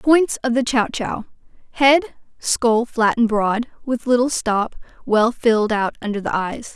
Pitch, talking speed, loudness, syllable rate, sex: 235 Hz, 160 wpm, -19 LUFS, 4.2 syllables/s, female